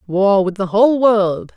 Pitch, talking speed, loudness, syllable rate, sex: 205 Hz, 190 wpm, -15 LUFS, 4.3 syllables/s, female